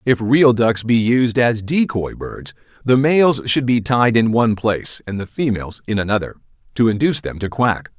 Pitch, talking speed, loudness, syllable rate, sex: 120 Hz, 195 wpm, -17 LUFS, 5.0 syllables/s, male